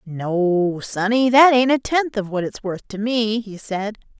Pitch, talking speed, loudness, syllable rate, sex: 215 Hz, 200 wpm, -19 LUFS, 3.9 syllables/s, female